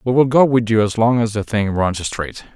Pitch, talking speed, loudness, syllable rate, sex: 115 Hz, 280 wpm, -17 LUFS, 5.0 syllables/s, male